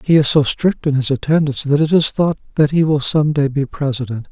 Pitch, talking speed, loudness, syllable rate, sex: 145 Hz, 250 wpm, -16 LUFS, 5.7 syllables/s, male